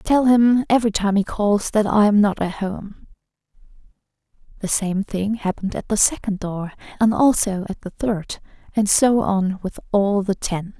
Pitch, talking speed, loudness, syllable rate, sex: 205 Hz, 180 wpm, -20 LUFS, 4.5 syllables/s, female